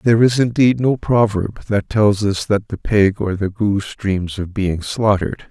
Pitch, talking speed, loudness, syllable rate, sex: 105 Hz, 195 wpm, -17 LUFS, 4.5 syllables/s, male